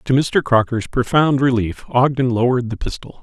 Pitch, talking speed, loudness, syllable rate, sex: 125 Hz, 165 wpm, -17 LUFS, 5.3 syllables/s, male